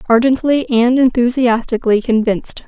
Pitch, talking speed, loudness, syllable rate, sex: 240 Hz, 90 wpm, -14 LUFS, 5.2 syllables/s, female